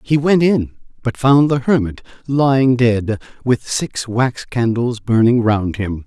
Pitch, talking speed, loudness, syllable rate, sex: 120 Hz, 160 wpm, -16 LUFS, 4.0 syllables/s, male